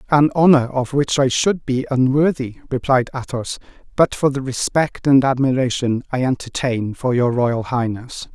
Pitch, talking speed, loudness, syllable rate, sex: 130 Hz, 160 wpm, -18 LUFS, 4.6 syllables/s, male